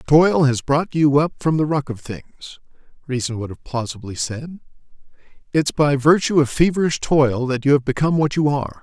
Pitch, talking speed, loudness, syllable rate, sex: 140 Hz, 190 wpm, -19 LUFS, 5.4 syllables/s, male